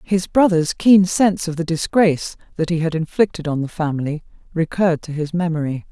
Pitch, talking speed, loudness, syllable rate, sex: 170 Hz, 185 wpm, -18 LUFS, 5.7 syllables/s, female